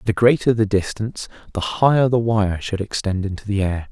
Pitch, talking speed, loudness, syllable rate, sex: 105 Hz, 200 wpm, -20 LUFS, 5.4 syllables/s, male